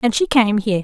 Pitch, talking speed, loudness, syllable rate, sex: 220 Hz, 285 wpm, -16 LUFS, 6.9 syllables/s, female